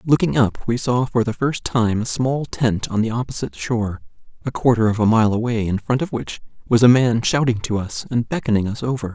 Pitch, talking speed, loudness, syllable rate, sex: 115 Hz, 230 wpm, -19 LUFS, 5.6 syllables/s, male